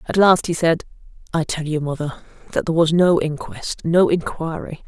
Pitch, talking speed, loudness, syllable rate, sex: 160 Hz, 170 wpm, -20 LUFS, 5.2 syllables/s, female